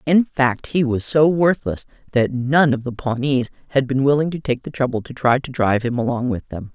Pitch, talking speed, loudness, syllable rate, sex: 130 Hz, 230 wpm, -19 LUFS, 5.2 syllables/s, female